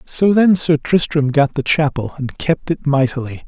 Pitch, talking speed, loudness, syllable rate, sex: 145 Hz, 190 wpm, -16 LUFS, 4.5 syllables/s, male